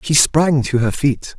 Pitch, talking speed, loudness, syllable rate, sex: 135 Hz, 215 wpm, -16 LUFS, 3.9 syllables/s, male